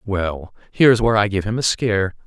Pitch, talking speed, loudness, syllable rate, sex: 105 Hz, 210 wpm, -18 LUFS, 5.7 syllables/s, male